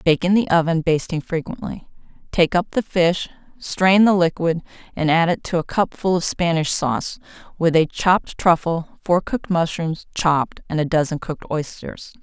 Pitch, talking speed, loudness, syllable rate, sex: 170 Hz, 170 wpm, -20 LUFS, 4.9 syllables/s, female